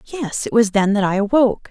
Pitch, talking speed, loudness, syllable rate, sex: 220 Hz, 245 wpm, -17 LUFS, 5.6 syllables/s, female